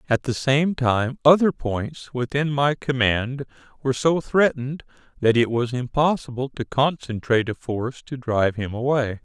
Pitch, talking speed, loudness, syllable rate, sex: 130 Hz, 155 wpm, -22 LUFS, 4.8 syllables/s, male